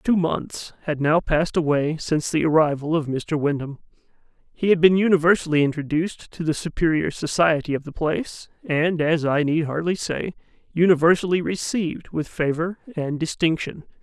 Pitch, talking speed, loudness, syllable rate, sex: 160 Hz, 155 wpm, -22 LUFS, 5.3 syllables/s, male